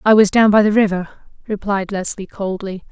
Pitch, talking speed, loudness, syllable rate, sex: 200 Hz, 185 wpm, -17 LUFS, 5.0 syllables/s, female